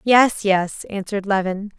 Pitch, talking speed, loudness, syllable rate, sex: 200 Hz, 135 wpm, -20 LUFS, 4.3 syllables/s, female